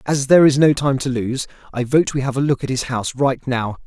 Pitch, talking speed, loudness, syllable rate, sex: 130 Hz, 280 wpm, -18 LUFS, 5.8 syllables/s, male